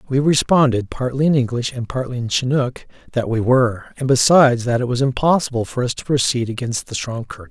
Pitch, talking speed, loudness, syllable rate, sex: 125 Hz, 210 wpm, -18 LUFS, 5.9 syllables/s, male